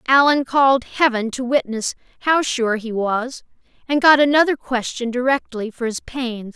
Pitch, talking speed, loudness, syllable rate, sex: 250 Hz, 155 wpm, -19 LUFS, 4.6 syllables/s, female